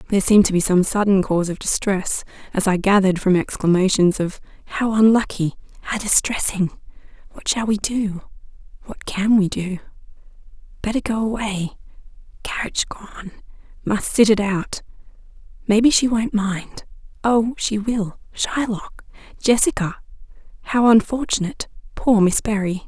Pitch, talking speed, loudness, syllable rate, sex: 205 Hz, 100 wpm, -19 LUFS, 5.3 syllables/s, female